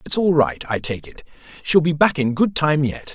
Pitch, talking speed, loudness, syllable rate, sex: 150 Hz, 250 wpm, -19 LUFS, 5.0 syllables/s, male